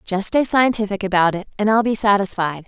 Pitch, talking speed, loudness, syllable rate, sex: 205 Hz, 200 wpm, -18 LUFS, 5.7 syllables/s, female